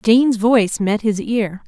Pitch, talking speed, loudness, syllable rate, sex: 220 Hz, 180 wpm, -17 LUFS, 4.4 syllables/s, female